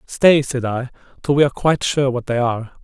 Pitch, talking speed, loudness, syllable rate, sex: 130 Hz, 235 wpm, -18 LUFS, 6.1 syllables/s, male